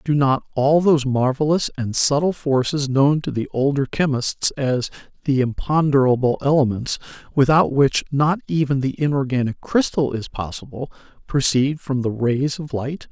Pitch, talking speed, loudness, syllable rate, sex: 140 Hz, 145 wpm, -20 LUFS, 4.7 syllables/s, male